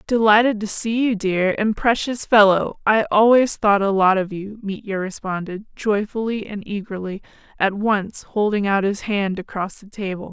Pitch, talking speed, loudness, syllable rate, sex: 205 Hz, 170 wpm, -20 LUFS, 4.6 syllables/s, female